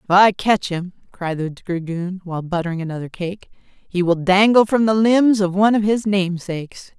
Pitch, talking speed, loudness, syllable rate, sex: 190 Hz, 190 wpm, -18 LUFS, 5.0 syllables/s, female